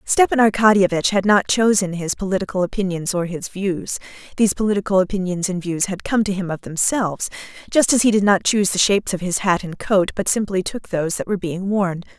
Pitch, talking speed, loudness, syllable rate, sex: 190 Hz, 210 wpm, -19 LUFS, 5.9 syllables/s, female